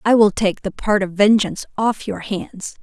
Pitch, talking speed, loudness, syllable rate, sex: 205 Hz, 210 wpm, -18 LUFS, 4.7 syllables/s, female